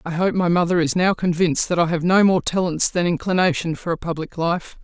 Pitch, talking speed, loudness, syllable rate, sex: 175 Hz, 235 wpm, -20 LUFS, 5.7 syllables/s, female